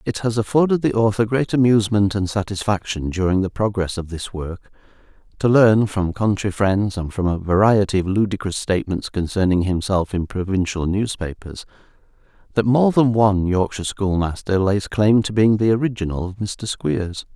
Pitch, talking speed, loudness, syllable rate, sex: 100 Hz, 160 wpm, -19 LUFS, 5.1 syllables/s, male